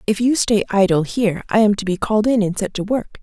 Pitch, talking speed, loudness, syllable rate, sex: 210 Hz, 280 wpm, -18 LUFS, 6.1 syllables/s, female